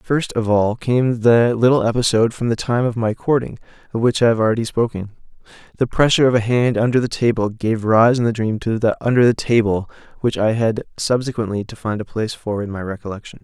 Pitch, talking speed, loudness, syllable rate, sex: 115 Hz, 220 wpm, -18 LUFS, 5.9 syllables/s, male